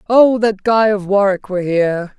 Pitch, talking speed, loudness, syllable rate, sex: 200 Hz, 190 wpm, -15 LUFS, 5.0 syllables/s, female